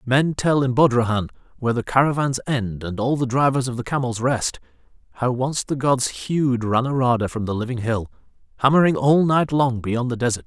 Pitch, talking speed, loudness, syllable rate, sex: 125 Hz, 190 wpm, -21 LUFS, 5.4 syllables/s, male